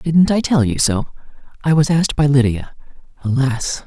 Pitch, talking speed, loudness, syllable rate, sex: 140 Hz, 155 wpm, -17 LUFS, 4.9 syllables/s, male